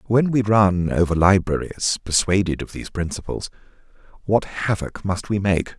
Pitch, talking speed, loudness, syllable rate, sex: 95 Hz, 145 wpm, -21 LUFS, 4.8 syllables/s, male